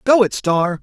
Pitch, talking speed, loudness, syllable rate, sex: 200 Hz, 215 wpm, -16 LUFS, 4.1 syllables/s, male